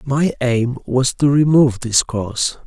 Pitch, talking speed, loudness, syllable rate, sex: 130 Hz, 155 wpm, -17 LUFS, 4.2 syllables/s, male